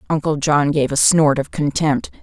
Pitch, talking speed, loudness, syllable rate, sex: 150 Hz, 190 wpm, -17 LUFS, 4.6 syllables/s, female